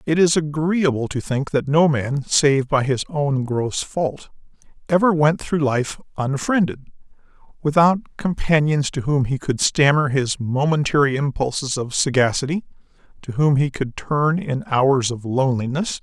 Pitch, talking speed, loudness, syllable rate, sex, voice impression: 145 Hz, 150 wpm, -20 LUFS, 4.4 syllables/s, male, masculine, adult-like, cool, sincere, friendly, slightly kind